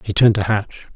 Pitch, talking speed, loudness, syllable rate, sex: 105 Hz, 250 wpm, -17 LUFS, 6.3 syllables/s, male